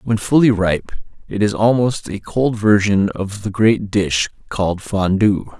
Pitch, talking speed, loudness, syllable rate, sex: 105 Hz, 160 wpm, -17 LUFS, 4.1 syllables/s, male